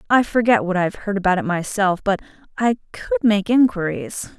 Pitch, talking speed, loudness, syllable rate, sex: 200 Hz, 190 wpm, -19 LUFS, 5.4 syllables/s, female